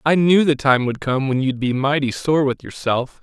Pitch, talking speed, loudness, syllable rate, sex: 140 Hz, 240 wpm, -18 LUFS, 4.8 syllables/s, male